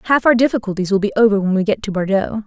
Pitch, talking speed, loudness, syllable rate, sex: 210 Hz, 265 wpm, -16 LUFS, 7.1 syllables/s, female